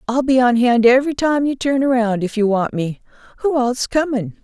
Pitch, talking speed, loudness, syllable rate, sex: 245 Hz, 215 wpm, -17 LUFS, 5.3 syllables/s, female